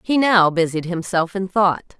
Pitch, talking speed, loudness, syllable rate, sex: 185 Hz, 180 wpm, -18 LUFS, 4.2 syllables/s, female